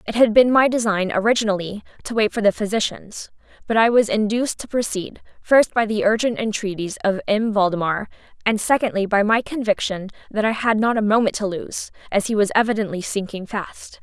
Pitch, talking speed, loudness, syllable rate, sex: 215 Hz, 190 wpm, -20 LUFS, 5.6 syllables/s, female